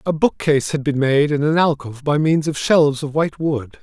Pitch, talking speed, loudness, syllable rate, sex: 145 Hz, 235 wpm, -18 LUFS, 5.7 syllables/s, male